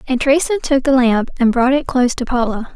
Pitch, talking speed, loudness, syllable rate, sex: 255 Hz, 240 wpm, -15 LUFS, 6.3 syllables/s, female